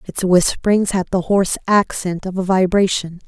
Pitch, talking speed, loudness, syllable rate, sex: 185 Hz, 165 wpm, -17 LUFS, 5.1 syllables/s, female